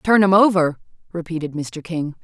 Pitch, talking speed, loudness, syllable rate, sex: 170 Hz, 160 wpm, -19 LUFS, 4.9 syllables/s, female